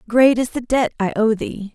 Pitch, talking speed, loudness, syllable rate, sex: 230 Hz, 240 wpm, -18 LUFS, 4.8 syllables/s, female